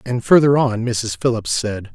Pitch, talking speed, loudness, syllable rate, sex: 120 Hz, 185 wpm, -17 LUFS, 4.4 syllables/s, male